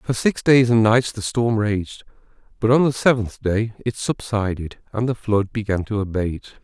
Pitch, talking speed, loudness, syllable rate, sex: 110 Hz, 190 wpm, -20 LUFS, 4.9 syllables/s, male